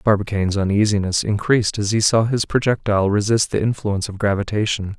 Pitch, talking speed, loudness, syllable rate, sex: 105 Hz, 155 wpm, -19 LUFS, 6.2 syllables/s, male